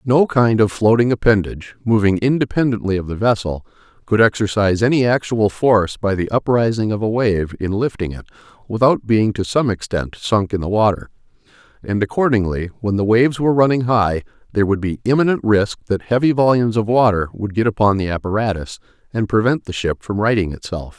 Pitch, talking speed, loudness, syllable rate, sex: 110 Hz, 180 wpm, -17 LUFS, 5.8 syllables/s, male